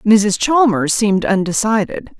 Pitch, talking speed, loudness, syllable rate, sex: 210 Hz, 110 wpm, -15 LUFS, 4.2 syllables/s, female